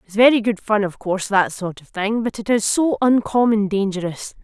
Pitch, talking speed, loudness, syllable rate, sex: 210 Hz, 215 wpm, -19 LUFS, 5.2 syllables/s, female